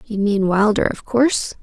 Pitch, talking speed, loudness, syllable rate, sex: 215 Hz, 185 wpm, -18 LUFS, 4.8 syllables/s, female